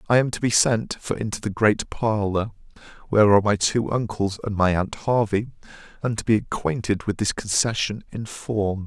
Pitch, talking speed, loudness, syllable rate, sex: 105 Hz, 190 wpm, -23 LUFS, 5.1 syllables/s, male